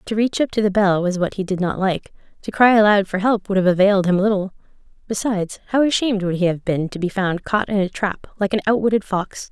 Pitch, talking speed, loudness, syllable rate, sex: 200 Hz, 250 wpm, -19 LUFS, 6.1 syllables/s, female